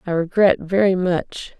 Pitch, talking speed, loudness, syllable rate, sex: 185 Hz, 150 wpm, -18 LUFS, 4.4 syllables/s, female